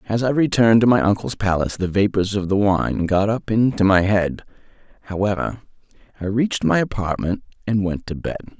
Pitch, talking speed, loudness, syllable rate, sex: 105 Hz, 180 wpm, -20 LUFS, 5.7 syllables/s, male